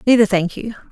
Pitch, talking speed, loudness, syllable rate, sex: 210 Hz, 195 wpm, -16 LUFS, 6.3 syllables/s, female